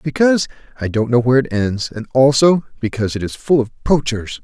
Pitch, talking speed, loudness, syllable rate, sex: 130 Hz, 205 wpm, -17 LUFS, 5.8 syllables/s, male